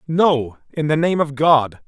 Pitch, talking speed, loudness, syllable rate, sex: 150 Hz, 190 wpm, -18 LUFS, 3.8 syllables/s, male